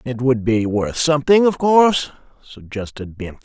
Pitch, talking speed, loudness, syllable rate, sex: 130 Hz, 155 wpm, -16 LUFS, 5.1 syllables/s, male